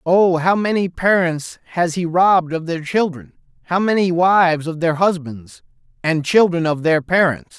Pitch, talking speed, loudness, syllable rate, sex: 170 Hz, 165 wpm, -17 LUFS, 4.4 syllables/s, male